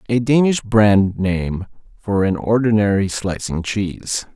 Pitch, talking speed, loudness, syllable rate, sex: 105 Hz, 125 wpm, -18 LUFS, 3.9 syllables/s, male